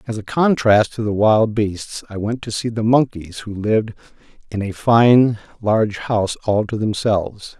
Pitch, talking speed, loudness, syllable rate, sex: 110 Hz, 180 wpm, -18 LUFS, 4.5 syllables/s, male